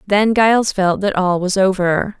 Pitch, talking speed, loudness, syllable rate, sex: 195 Hz, 190 wpm, -15 LUFS, 4.4 syllables/s, female